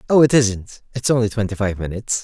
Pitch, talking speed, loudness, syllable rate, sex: 110 Hz, 190 wpm, -19 LUFS, 6.3 syllables/s, male